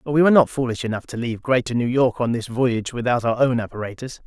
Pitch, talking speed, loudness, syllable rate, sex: 120 Hz, 255 wpm, -21 LUFS, 6.8 syllables/s, male